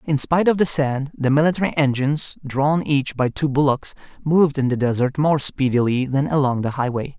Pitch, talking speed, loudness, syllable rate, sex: 140 Hz, 190 wpm, -19 LUFS, 5.4 syllables/s, male